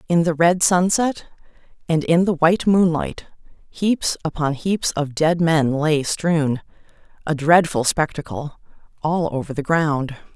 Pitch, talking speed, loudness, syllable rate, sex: 160 Hz, 140 wpm, -19 LUFS, 4.0 syllables/s, female